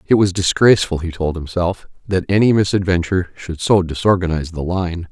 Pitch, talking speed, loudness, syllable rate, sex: 90 Hz, 165 wpm, -17 LUFS, 5.7 syllables/s, male